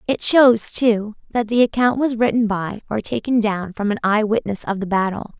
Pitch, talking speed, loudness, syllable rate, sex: 220 Hz, 210 wpm, -19 LUFS, 4.8 syllables/s, female